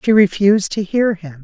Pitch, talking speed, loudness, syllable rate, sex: 195 Hz, 210 wpm, -15 LUFS, 5.3 syllables/s, female